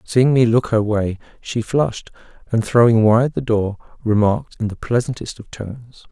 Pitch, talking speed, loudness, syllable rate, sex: 115 Hz, 175 wpm, -18 LUFS, 4.9 syllables/s, male